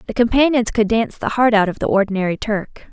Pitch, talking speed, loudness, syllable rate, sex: 220 Hz, 225 wpm, -17 LUFS, 6.3 syllables/s, female